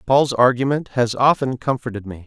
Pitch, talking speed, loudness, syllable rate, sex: 125 Hz, 160 wpm, -19 LUFS, 5.1 syllables/s, male